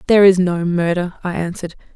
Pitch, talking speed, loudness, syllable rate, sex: 180 Hz, 185 wpm, -17 LUFS, 6.6 syllables/s, female